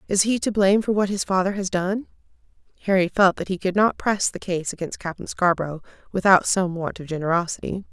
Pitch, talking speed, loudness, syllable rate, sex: 190 Hz, 205 wpm, -22 LUFS, 5.9 syllables/s, female